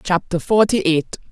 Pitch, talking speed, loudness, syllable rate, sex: 185 Hz, 135 wpm, -18 LUFS, 4.6 syllables/s, female